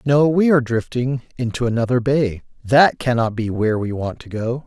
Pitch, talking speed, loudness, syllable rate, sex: 125 Hz, 195 wpm, -19 LUFS, 5.2 syllables/s, male